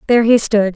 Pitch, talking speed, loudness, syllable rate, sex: 220 Hz, 235 wpm, -13 LUFS, 6.5 syllables/s, female